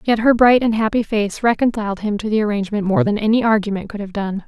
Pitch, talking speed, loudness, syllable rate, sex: 215 Hz, 240 wpm, -18 LUFS, 6.4 syllables/s, female